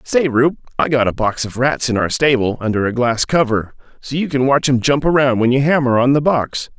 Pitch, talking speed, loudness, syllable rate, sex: 130 Hz, 250 wpm, -16 LUFS, 5.4 syllables/s, male